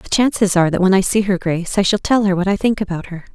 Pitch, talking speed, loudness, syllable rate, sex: 195 Hz, 325 wpm, -16 LUFS, 6.8 syllables/s, female